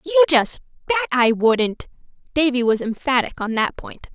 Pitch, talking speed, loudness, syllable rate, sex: 265 Hz, 160 wpm, -19 LUFS, 4.8 syllables/s, female